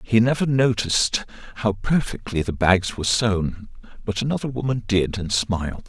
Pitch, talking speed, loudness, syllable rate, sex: 110 Hz, 155 wpm, -22 LUFS, 5.2 syllables/s, male